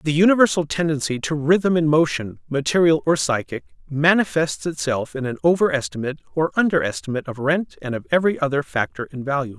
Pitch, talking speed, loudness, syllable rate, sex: 150 Hz, 165 wpm, -20 LUFS, 5.7 syllables/s, male